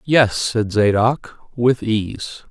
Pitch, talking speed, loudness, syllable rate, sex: 115 Hz, 120 wpm, -18 LUFS, 2.6 syllables/s, male